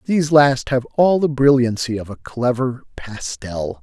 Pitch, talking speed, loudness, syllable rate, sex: 130 Hz, 155 wpm, -18 LUFS, 4.4 syllables/s, male